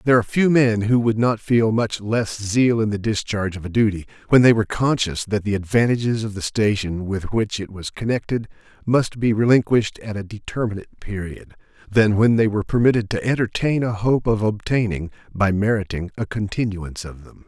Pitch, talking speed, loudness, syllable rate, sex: 110 Hz, 190 wpm, -20 LUFS, 5.6 syllables/s, male